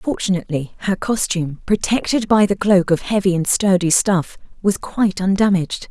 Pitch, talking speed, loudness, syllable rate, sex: 190 Hz, 150 wpm, -18 LUFS, 5.3 syllables/s, female